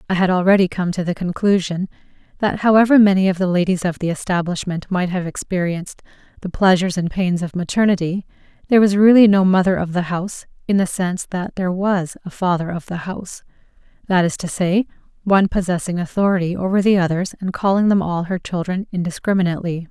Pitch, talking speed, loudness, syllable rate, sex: 185 Hz, 185 wpm, -18 LUFS, 6.2 syllables/s, female